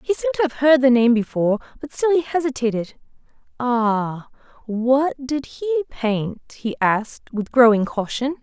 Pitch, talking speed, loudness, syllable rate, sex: 255 Hz, 150 wpm, -20 LUFS, 4.7 syllables/s, female